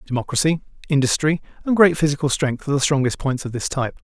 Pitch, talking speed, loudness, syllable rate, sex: 145 Hz, 190 wpm, -20 LUFS, 6.8 syllables/s, male